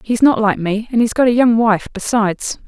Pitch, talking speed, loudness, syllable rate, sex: 225 Hz, 245 wpm, -15 LUFS, 5.4 syllables/s, female